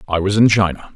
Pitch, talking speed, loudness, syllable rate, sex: 100 Hz, 255 wpm, -15 LUFS, 6.5 syllables/s, male